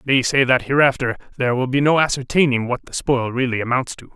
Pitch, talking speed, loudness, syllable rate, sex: 130 Hz, 215 wpm, -18 LUFS, 6.0 syllables/s, male